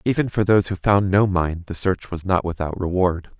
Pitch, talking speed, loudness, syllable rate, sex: 95 Hz, 230 wpm, -21 LUFS, 5.3 syllables/s, male